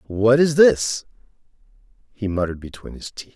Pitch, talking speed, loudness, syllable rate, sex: 115 Hz, 145 wpm, -18 LUFS, 5.2 syllables/s, male